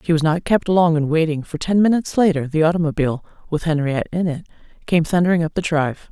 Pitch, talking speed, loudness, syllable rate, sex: 165 Hz, 215 wpm, -19 LUFS, 6.6 syllables/s, female